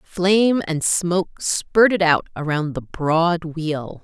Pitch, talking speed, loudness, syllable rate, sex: 170 Hz, 135 wpm, -19 LUFS, 3.4 syllables/s, female